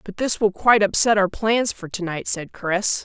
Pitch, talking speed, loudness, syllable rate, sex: 200 Hz, 235 wpm, -20 LUFS, 4.8 syllables/s, female